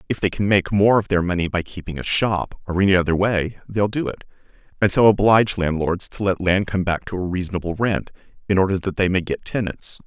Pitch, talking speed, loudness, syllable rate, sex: 95 Hz, 230 wpm, -20 LUFS, 5.8 syllables/s, male